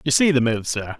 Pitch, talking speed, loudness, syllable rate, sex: 130 Hz, 305 wpm, -20 LUFS, 5.6 syllables/s, male